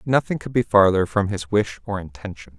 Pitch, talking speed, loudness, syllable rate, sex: 100 Hz, 210 wpm, -21 LUFS, 5.3 syllables/s, male